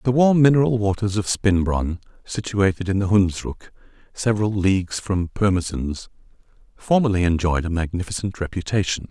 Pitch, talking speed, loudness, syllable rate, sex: 100 Hz, 125 wpm, -21 LUFS, 5.3 syllables/s, male